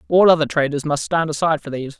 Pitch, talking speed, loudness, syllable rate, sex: 155 Hz, 240 wpm, -18 LUFS, 7.2 syllables/s, male